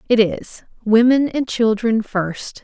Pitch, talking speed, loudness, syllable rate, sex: 225 Hz, 135 wpm, -17 LUFS, 3.5 syllables/s, female